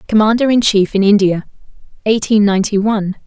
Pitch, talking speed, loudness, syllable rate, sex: 205 Hz, 145 wpm, -13 LUFS, 6.2 syllables/s, female